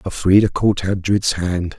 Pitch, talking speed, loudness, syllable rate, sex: 95 Hz, 135 wpm, -17 LUFS, 4.2 syllables/s, male